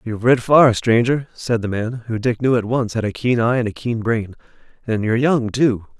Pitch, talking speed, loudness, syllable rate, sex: 120 Hz, 240 wpm, -18 LUFS, 5.1 syllables/s, male